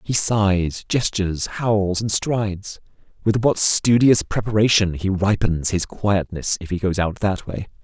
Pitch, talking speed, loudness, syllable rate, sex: 100 Hz, 155 wpm, -20 LUFS, 4.1 syllables/s, male